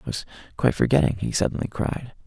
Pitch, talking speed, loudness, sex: 110 Hz, 185 wpm, -24 LUFS, male